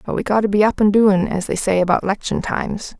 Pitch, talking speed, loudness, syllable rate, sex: 205 Hz, 280 wpm, -18 LUFS, 5.9 syllables/s, female